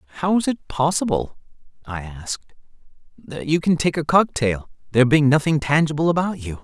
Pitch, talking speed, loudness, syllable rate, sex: 145 Hz, 165 wpm, -20 LUFS, 5.5 syllables/s, male